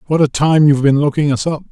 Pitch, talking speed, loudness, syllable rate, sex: 145 Hz, 280 wpm, -13 LUFS, 6.6 syllables/s, male